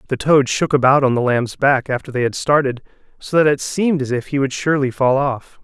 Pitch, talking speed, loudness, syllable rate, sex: 135 Hz, 245 wpm, -17 LUFS, 5.7 syllables/s, male